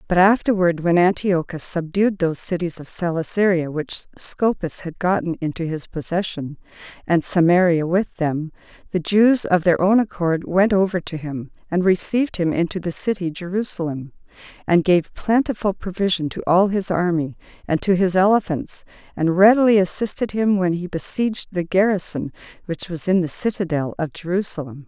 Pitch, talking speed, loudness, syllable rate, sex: 180 Hz, 155 wpm, -20 LUFS, 5.0 syllables/s, female